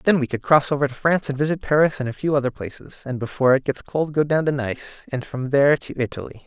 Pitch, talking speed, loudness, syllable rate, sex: 140 Hz, 270 wpm, -21 LUFS, 6.3 syllables/s, male